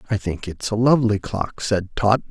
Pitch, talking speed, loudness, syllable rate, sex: 105 Hz, 210 wpm, -21 LUFS, 5.1 syllables/s, male